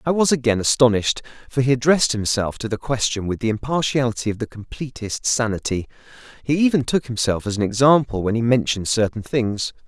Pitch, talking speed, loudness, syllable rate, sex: 120 Hz, 180 wpm, -20 LUFS, 6.0 syllables/s, male